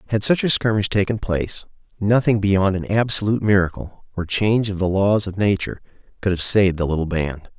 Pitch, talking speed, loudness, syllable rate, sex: 100 Hz, 190 wpm, -19 LUFS, 5.9 syllables/s, male